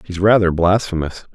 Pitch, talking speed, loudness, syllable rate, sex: 90 Hz, 135 wpm, -16 LUFS, 5.1 syllables/s, male